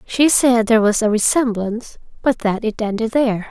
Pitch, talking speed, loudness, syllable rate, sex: 225 Hz, 190 wpm, -17 LUFS, 5.4 syllables/s, female